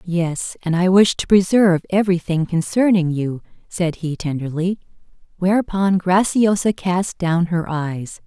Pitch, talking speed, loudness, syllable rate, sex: 180 Hz, 130 wpm, -18 LUFS, 4.3 syllables/s, female